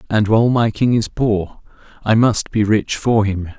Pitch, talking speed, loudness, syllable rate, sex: 110 Hz, 200 wpm, -17 LUFS, 4.4 syllables/s, male